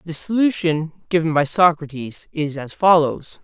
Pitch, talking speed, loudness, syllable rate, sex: 160 Hz, 140 wpm, -19 LUFS, 4.5 syllables/s, male